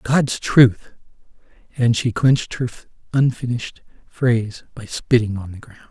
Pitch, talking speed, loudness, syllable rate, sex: 120 Hz, 130 wpm, -19 LUFS, 4.6 syllables/s, male